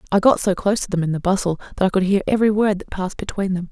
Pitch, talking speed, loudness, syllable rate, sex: 195 Hz, 305 wpm, -20 LUFS, 7.8 syllables/s, female